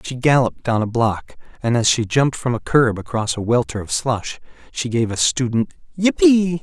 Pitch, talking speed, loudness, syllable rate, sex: 120 Hz, 200 wpm, -19 LUFS, 5.0 syllables/s, male